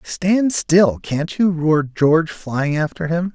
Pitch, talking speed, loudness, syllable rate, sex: 165 Hz, 160 wpm, -18 LUFS, 3.7 syllables/s, male